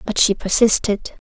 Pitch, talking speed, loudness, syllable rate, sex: 210 Hz, 140 wpm, -17 LUFS, 4.6 syllables/s, female